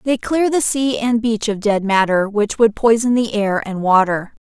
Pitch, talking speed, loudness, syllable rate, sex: 220 Hz, 215 wpm, -17 LUFS, 4.5 syllables/s, female